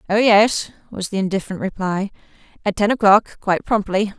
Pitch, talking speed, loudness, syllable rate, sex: 200 Hz, 160 wpm, -18 LUFS, 5.7 syllables/s, female